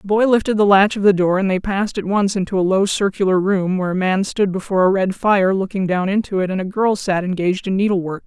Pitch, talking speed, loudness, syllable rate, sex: 195 Hz, 270 wpm, -17 LUFS, 6.2 syllables/s, female